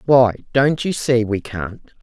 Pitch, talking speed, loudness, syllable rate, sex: 125 Hz, 180 wpm, -18 LUFS, 3.7 syllables/s, female